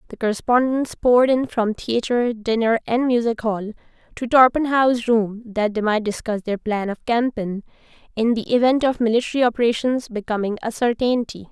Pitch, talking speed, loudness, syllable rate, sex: 230 Hz, 155 wpm, -20 LUFS, 5.1 syllables/s, female